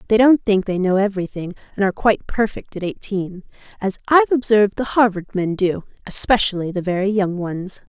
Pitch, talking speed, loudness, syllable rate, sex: 200 Hz, 180 wpm, -19 LUFS, 5.8 syllables/s, female